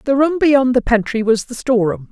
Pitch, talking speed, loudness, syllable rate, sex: 245 Hz, 225 wpm, -15 LUFS, 5.3 syllables/s, female